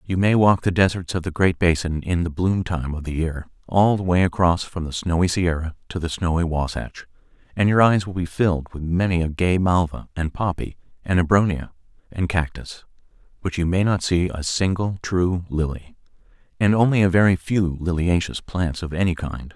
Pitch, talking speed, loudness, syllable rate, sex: 90 Hz, 195 wpm, -21 LUFS, 5.0 syllables/s, male